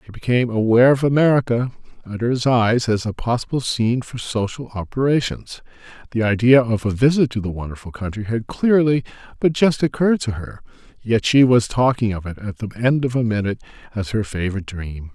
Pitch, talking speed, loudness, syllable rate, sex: 115 Hz, 185 wpm, -19 LUFS, 6.1 syllables/s, male